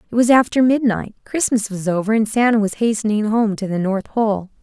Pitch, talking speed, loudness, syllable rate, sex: 215 Hz, 210 wpm, -18 LUFS, 5.4 syllables/s, female